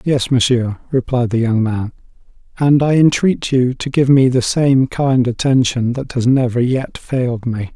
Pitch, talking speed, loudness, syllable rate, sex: 125 Hz, 180 wpm, -15 LUFS, 4.4 syllables/s, male